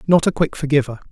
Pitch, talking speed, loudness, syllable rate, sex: 150 Hz, 215 wpm, -18 LUFS, 6.7 syllables/s, male